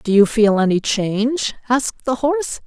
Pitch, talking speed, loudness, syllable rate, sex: 235 Hz, 180 wpm, -18 LUFS, 4.9 syllables/s, female